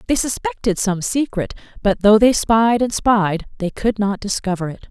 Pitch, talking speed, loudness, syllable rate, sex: 215 Hz, 185 wpm, -18 LUFS, 4.6 syllables/s, female